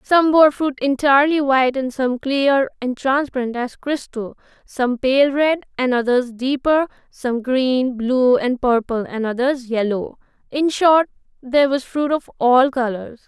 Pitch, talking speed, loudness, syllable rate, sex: 260 Hz, 155 wpm, -18 LUFS, 4.2 syllables/s, female